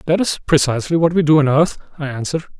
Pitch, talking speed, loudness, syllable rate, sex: 155 Hz, 230 wpm, -16 LUFS, 7.4 syllables/s, male